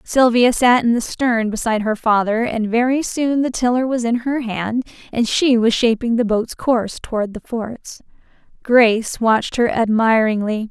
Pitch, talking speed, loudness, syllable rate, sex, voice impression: 230 Hz, 175 wpm, -17 LUFS, 4.6 syllables/s, female, very feminine, young, very thin, very tensed, very powerful, very bright, soft, very clear, very fluent, slightly raspy, very cute, intellectual, very refreshing, slightly sincere, slightly calm, very friendly, very reassuring, very unique, elegant, wild, very sweet, very lively, slightly kind, intense, sharp, very light